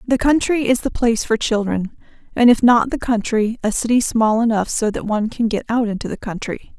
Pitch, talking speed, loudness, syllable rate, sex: 230 Hz, 220 wpm, -18 LUFS, 5.5 syllables/s, female